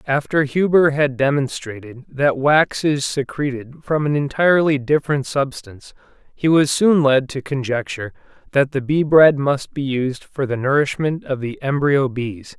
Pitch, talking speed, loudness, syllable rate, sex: 140 Hz, 155 wpm, -18 LUFS, 4.6 syllables/s, male